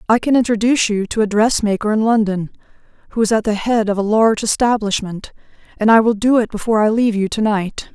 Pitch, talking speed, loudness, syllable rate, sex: 215 Hz, 220 wpm, -16 LUFS, 6.3 syllables/s, female